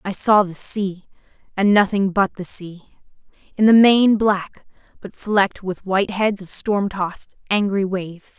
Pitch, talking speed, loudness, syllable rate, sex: 195 Hz, 165 wpm, -18 LUFS, 4.5 syllables/s, female